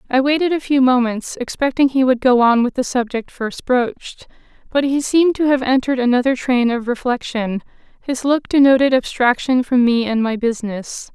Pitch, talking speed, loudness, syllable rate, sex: 255 Hz, 185 wpm, -17 LUFS, 5.3 syllables/s, female